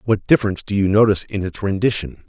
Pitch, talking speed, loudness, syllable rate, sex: 100 Hz, 210 wpm, -18 LUFS, 7.1 syllables/s, male